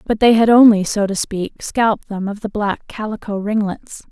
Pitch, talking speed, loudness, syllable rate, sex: 210 Hz, 205 wpm, -17 LUFS, 4.9 syllables/s, female